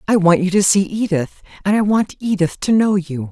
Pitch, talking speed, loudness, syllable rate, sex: 185 Hz, 235 wpm, -17 LUFS, 5.2 syllables/s, female